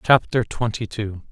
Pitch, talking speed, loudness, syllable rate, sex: 110 Hz, 135 wpm, -22 LUFS, 4.2 syllables/s, male